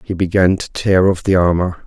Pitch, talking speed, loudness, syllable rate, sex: 90 Hz, 225 wpm, -15 LUFS, 5.1 syllables/s, male